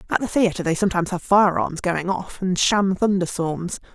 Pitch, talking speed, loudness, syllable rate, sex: 185 Hz, 200 wpm, -21 LUFS, 5.3 syllables/s, female